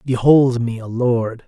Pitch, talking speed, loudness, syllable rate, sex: 120 Hz, 165 wpm, -17 LUFS, 3.7 syllables/s, male